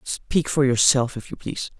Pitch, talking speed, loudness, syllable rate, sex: 135 Hz, 200 wpm, -21 LUFS, 4.9 syllables/s, male